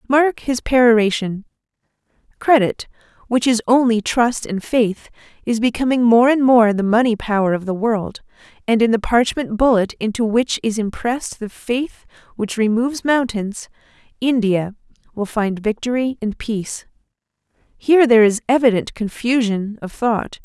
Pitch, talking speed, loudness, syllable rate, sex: 230 Hz, 140 wpm, -17 LUFS, 4.8 syllables/s, female